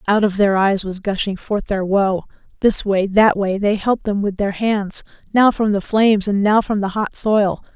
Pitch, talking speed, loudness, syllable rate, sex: 205 Hz, 225 wpm, -18 LUFS, 4.7 syllables/s, female